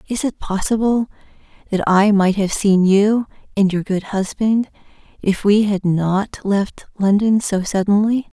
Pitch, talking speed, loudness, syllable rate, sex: 205 Hz, 150 wpm, -17 LUFS, 4.1 syllables/s, female